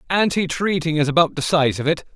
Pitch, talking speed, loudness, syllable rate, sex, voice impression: 160 Hz, 195 wpm, -19 LUFS, 5.9 syllables/s, male, masculine, adult-like, powerful, fluent, slightly unique, slightly intense